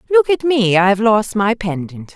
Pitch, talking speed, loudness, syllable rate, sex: 220 Hz, 165 wpm, -15 LUFS, 4.6 syllables/s, female